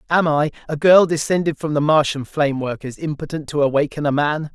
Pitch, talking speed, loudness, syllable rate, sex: 150 Hz, 200 wpm, -19 LUFS, 5.7 syllables/s, male